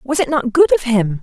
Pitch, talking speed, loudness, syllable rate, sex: 240 Hz, 295 wpm, -15 LUFS, 5.0 syllables/s, female